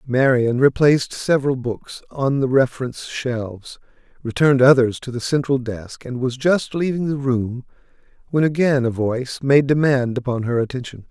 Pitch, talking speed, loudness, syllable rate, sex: 130 Hz, 155 wpm, -19 LUFS, 5.0 syllables/s, male